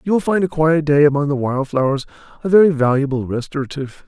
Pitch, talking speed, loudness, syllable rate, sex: 145 Hz, 205 wpm, -17 LUFS, 6.4 syllables/s, male